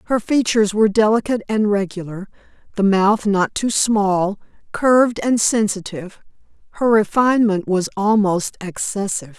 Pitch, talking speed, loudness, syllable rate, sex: 205 Hz, 120 wpm, -18 LUFS, 5.0 syllables/s, female